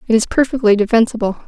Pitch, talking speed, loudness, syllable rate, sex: 225 Hz, 165 wpm, -15 LUFS, 6.9 syllables/s, female